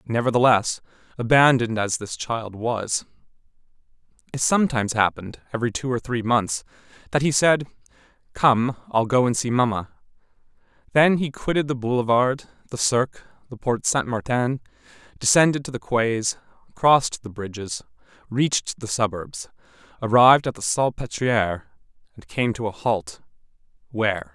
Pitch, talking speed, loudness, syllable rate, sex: 120 Hz, 135 wpm, -22 LUFS, 5.1 syllables/s, male